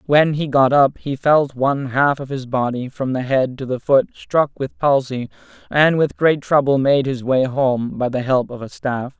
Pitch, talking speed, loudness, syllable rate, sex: 135 Hz, 220 wpm, -18 LUFS, 4.4 syllables/s, male